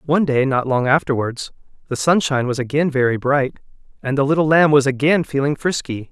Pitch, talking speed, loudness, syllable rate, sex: 140 Hz, 185 wpm, -18 LUFS, 5.8 syllables/s, male